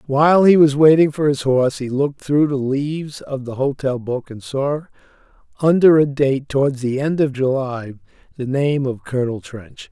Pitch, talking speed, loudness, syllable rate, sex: 140 Hz, 190 wpm, -18 LUFS, 4.9 syllables/s, male